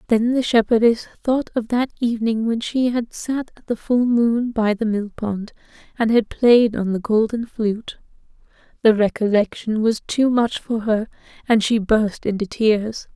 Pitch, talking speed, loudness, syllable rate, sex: 225 Hz, 175 wpm, -20 LUFS, 4.4 syllables/s, female